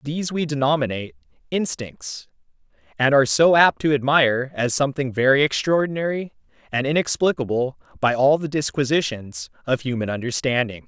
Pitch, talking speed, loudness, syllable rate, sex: 135 Hz, 125 wpm, -21 LUFS, 5.6 syllables/s, male